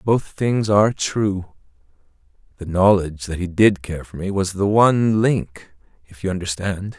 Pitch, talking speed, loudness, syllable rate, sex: 95 Hz, 165 wpm, -19 LUFS, 4.5 syllables/s, male